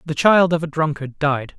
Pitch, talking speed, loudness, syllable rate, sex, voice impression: 150 Hz, 225 wpm, -18 LUFS, 4.8 syllables/s, male, masculine, adult-like, fluent, refreshing, slightly unique, slightly lively